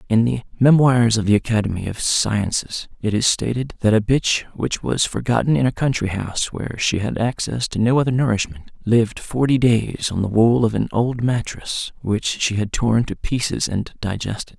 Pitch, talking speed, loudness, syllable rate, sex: 115 Hz, 195 wpm, -20 LUFS, 5.0 syllables/s, male